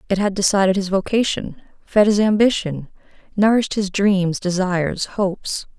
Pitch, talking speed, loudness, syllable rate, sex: 195 Hz, 135 wpm, -19 LUFS, 5.0 syllables/s, female